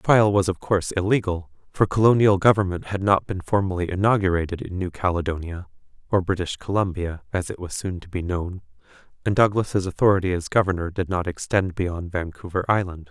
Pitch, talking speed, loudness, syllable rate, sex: 95 Hz, 175 wpm, -23 LUFS, 5.7 syllables/s, male